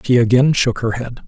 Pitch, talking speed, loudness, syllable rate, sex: 120 Hz, 235 wpm, -16 LUFS, 5.2 syllables/s, male